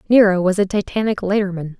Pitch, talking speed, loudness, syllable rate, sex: 195 Hz, 165 wpm, -18 LUFS, 6.2 syllables/s, female